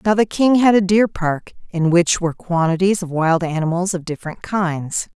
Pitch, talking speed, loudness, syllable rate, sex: 180 Hz, 195 wpm, -18 LUFS, 5.0 syllables/s, female